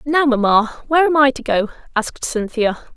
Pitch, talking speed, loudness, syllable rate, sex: 255 Hz, 180 wpm, -17 LUFS, 5.4 syllables/s, female